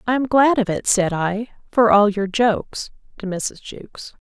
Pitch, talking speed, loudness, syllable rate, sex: 215 Hz, 195 wpm, -18 LUFS, 4.5 syllables/s, female